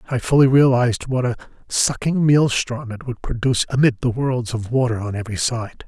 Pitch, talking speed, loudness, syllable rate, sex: 125 Hz, 185 wpm, -19 LUFS, 5.3 syllables/s, male